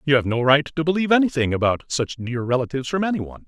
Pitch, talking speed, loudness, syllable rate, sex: 140 Hz, 240 wpm, -21 LUFS, 7.3 syllables/s, male